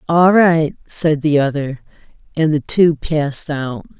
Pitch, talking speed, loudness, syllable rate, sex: 155 Hz, 150 wpm, -16 LUFS, 3.9 syllables/s, female